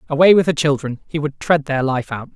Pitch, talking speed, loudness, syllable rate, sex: 145 Hz, 255 wpm, -17 LUFS, 5.8 syllables/s, male